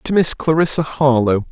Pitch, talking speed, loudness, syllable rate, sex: 145 Hz, 160 wpm, -15 LUFS, 5.7 syllables/s, male